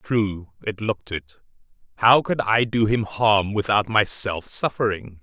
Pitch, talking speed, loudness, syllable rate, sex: 105 Hz, 150 wpm, -21 LUFS, 4.0 syllables/s, male